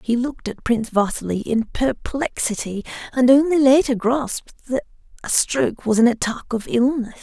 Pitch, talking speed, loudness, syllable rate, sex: 240 Hz, 160 wpm, -20 LUFS, 5.1 syllables/s, female